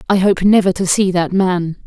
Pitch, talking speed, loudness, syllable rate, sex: 185 Hz, 225 wpm, -14 LUFS, 4.8 syllables/s, female